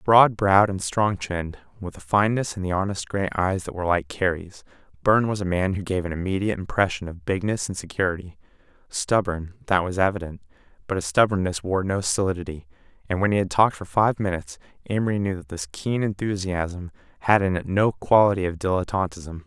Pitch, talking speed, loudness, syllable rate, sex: 95 Hz, 185 wpm, -23 LUFS, 5.9 syllables/s, male